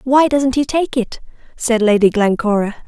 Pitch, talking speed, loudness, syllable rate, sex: 240 Hz, 165 wpm, -15 LUFS, 4.7 syllables/s, female